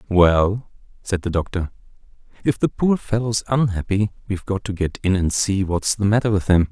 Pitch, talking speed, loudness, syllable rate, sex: 100 Hz, 190 wpm, -21 LUFS, 5.2 syllables/s, male